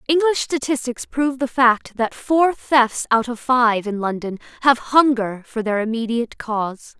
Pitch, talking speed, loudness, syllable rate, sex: 245 Hz, 165 wpm, -19 LUFS, 4.5 syllables/s, female